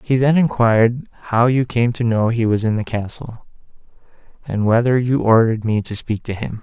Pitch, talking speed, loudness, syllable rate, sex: 115 Hz, 200 wpm, -17 LUFS, 5.3 syllables/s, male